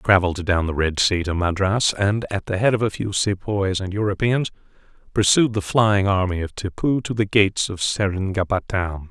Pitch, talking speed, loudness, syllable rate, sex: 100 Hz, 190 wpm, -21 LUFS, 5.1 syllables/s, male